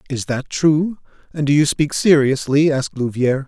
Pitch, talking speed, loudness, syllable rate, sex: 145 Hz, 175 wpm, -17 LUFS, 5.1 syllables/s, male